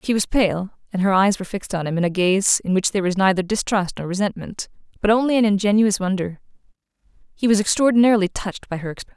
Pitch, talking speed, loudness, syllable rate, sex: 200 Hz, 215 wpm, -20 LUFS, 6.8 syllables/s, female